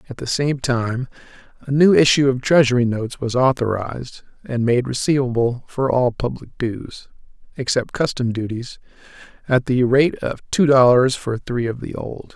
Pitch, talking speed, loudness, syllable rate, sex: 125 Hz, 160 wpm, -19 LUFS, 4.7 syllables/s, male